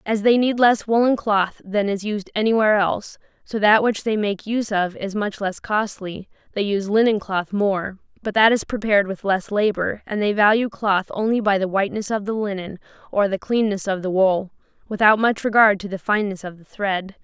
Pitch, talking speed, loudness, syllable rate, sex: 205 Hz, 210 wpm, -20 LUFS, 5.3 syllables/s, female